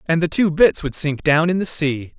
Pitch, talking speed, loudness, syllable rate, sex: 160 Hz, 275 wpm, -18 LUFS, 4.8 syllables/s, male